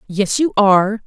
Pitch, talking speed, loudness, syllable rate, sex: 205 Hz, 170 wpm, -15 LUFS, 4.7 syllables/s, female